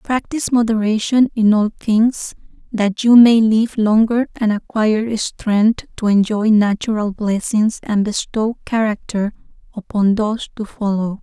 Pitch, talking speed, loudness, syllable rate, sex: 220 Hz, 130 wpm, -16 LUFS, 4.2 syllables/s, female